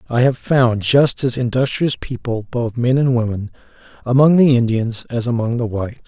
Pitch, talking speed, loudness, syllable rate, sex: 120 Hz, 180 wpm, -17 LUFS, 5.0 syllables/s, male